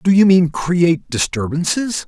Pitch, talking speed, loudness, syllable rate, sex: 170 Hz, 145 wpm, -16 LUFS, 4.4 syllables/s, male